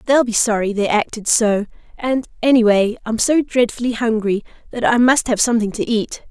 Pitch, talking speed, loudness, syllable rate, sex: 230 Hz, 190 wpm, -17 LUFS, 5.2 syllables/s, female